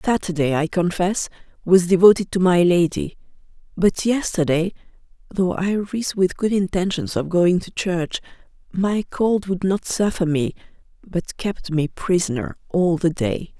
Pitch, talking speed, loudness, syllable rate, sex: 180 Hz, 145 wpm, -20 LUFS, 4.3 syllables/s, female